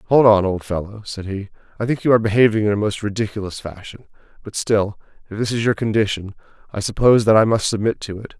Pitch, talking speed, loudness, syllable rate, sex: 105 Hz, 220 wpm, -19 LUFS, 6.5 syllables/s, male